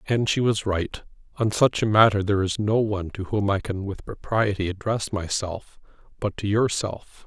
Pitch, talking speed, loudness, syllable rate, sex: 105 Hz, 190 wpm, -24 LUFS, 4.8 syllables/s, male